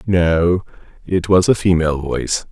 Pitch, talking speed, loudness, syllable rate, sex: 90 Hz, 145 wpm, -16 LUFS, 4.7 syllables/s, male